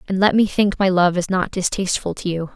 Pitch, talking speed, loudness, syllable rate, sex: 185 Hz, 260 wpm, -19 LUFS, 5.9 syllables/s, female